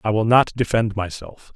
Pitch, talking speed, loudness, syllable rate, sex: 110 Hz, 195 wpm, -19 LUFS, 5.0 syllables/s, male